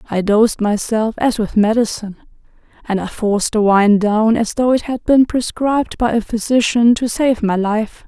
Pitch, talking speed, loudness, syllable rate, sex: 225 Hz, 185 wpm, -16 LUFS, 4.9 syllables/s, female